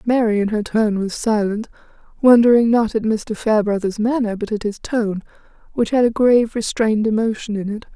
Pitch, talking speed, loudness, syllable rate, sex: 220 Hz, 180 wpm, -18 LUFS, 5.5 syllables/s, female